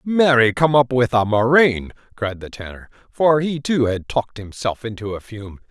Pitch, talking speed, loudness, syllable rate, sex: 120 Hz, 190 wpm, -18 LUFS, 4.7 syllables/s, male